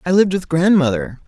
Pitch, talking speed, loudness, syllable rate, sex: 160 Hz, 190 wpm, -16 LUFS, 6.3 syllables/s, male